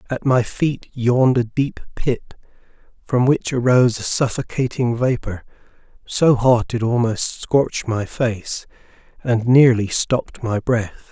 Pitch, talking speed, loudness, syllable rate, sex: 120 Hz, 135 wpm, -19 LUFS, 4.1 syllables/s, male